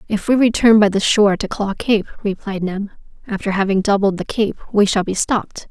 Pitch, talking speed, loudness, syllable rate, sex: 205 Hz, 210 wpm, -17 LUFS, 5.5 syllables/s, female